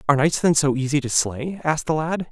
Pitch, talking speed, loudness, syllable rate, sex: 145 Hz, 260 wpm, -21 LUFS, 6.2 syllables/s, male